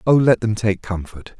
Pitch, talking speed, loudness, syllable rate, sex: 105 Hz, 215 wpm, -19 LUFS, 4.7 syllables/s, male